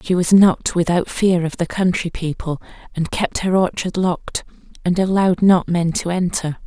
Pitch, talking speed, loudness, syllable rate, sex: 175 Hz, 180 wpm, -18 LUFS, 4.8 syllables/s, female